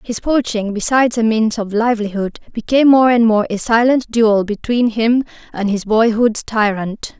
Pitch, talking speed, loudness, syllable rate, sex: 225 Hz, 165 wpm, -15 LUFS, 4.8 syllables/s, female